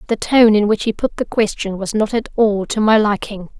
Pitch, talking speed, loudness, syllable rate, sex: 215 Hz, 250 wpm, -16 LUFS, 5.4 syllables/s, female